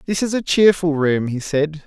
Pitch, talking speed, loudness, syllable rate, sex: 165 Hz, 225 wpm, -18 LUFS, 4.7 syllables/s, male